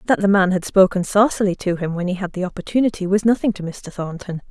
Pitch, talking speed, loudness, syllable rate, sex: 190 Hz, 240 wpm, -19 LUFS, 6.2 syllables/s, female